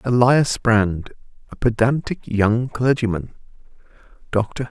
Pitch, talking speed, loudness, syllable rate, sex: 115 Hz, 90 wpm, -19 LUFS, 3.8 syllables/s, male